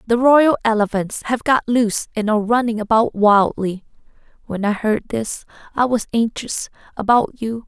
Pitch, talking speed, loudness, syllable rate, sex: 225 Hz, 155 wpm, -18 LUFS, 4.8 syllables/s, female